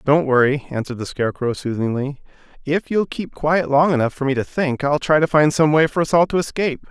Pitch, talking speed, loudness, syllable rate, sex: 145 Hz, 235 wpm, -19 LUFS, 5.9 syllables/s, male